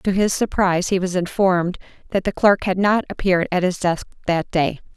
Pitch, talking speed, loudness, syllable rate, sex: 185 Hz, 205 wpm, -20 LUFS, 5.5 syllables/s, female